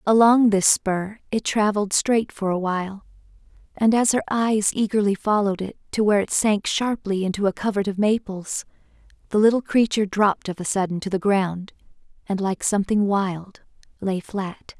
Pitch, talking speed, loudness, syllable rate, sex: 205 Hz, 170 wpm, -22 LUFS, 5.1 syllables/s, female